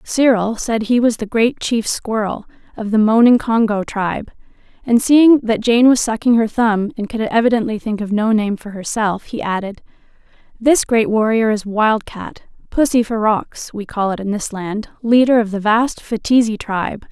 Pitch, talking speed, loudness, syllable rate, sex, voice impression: 220 Hz, 180 wpm, -16 LUFS, 4.7 syllables/s, female, masculine, feminine, adult-like, slightly muffled, calm, friendly, kind